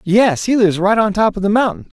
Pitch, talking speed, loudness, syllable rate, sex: 200 Hz, 270 wpm, -15 LUFS, 6.0 syllables/s, male